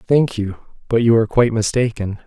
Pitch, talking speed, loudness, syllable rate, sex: 115 Hz, 185 wpm, -18 LUFS, 6.2 syllables/s, male